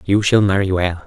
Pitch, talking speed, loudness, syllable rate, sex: 95 Hz, 225 wpm, -16 LUFS, 5.2 syllables/s, male